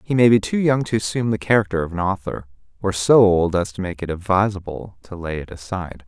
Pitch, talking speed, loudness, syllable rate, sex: 95 Hz, 235 wpm, -20 LUFS, 6.1 syllables/s, male